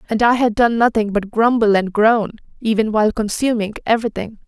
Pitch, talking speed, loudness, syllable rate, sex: 220 Hz, 190 wpm, -17 LUFS, 5.7 syllables/s, female